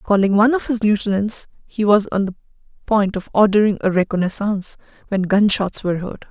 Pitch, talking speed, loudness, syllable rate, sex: 205 Hz, 170 wpm, -18 LUFS, 5.9 syllables/s, female